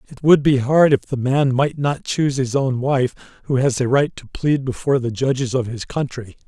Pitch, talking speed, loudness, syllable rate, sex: 130 Hz, 230 wpm, -19 LUFS, 5.3 syllables/s, male